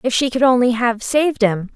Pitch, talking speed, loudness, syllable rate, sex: 240 Hz, 240 wpm, -16 LUFS, 5.5 syllables/s, female